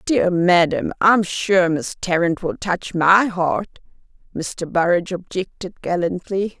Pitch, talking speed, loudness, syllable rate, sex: 180 Hz, 125 wpm, -19 LUFS, 3.7 syllables/s, female